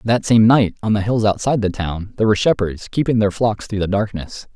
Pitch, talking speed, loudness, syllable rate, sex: 105 Hz, 235 wpm, -18 LUFS, 5.9 syllables/s, male